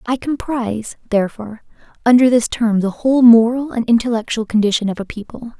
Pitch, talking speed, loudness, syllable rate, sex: 230 Hz, 160 wpm, -16 LUFS, 5.9 syllables/s, female